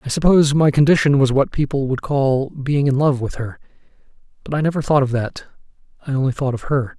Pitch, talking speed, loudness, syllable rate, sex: 140 Hz, 215 wpm, -18 LUFS, 5.8 syllables/s, male